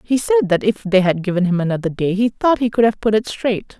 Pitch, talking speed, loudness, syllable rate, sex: 210 Hz, 285 wpm, -17 LUFS, 6.0 syllables/s, female